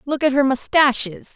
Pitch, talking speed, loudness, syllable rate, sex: 270 Hz, 175 wpm, -18 LUFS, 4.9 syllables/s, female